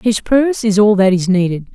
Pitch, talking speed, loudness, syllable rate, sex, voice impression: 205 Hz, 240 wpm, -13 LUFS, 5.4 syllables/s, female, feminine, adult-like, slightly middle-aged, slightly relaxed, slightly weak, slightly bright, slightly hard, muffled, slightly fluent, slightly cute, intellectual, slightly refreshing, sincere, slightly calm, slightly friendly, slightly reassuring, elegant, slightly sweet, kind, very modest